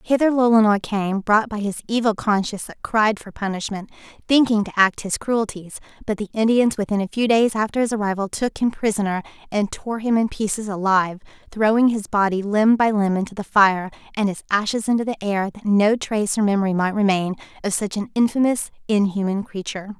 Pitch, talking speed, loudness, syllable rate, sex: 210 Hz, 190 wpm, -20 LUFS, 5.1 syllables/s, female